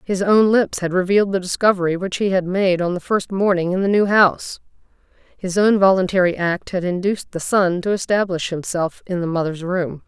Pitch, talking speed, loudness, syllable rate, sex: 185 Hz, 200 wpm, -18 LUFS, 5.5 syllables/s, female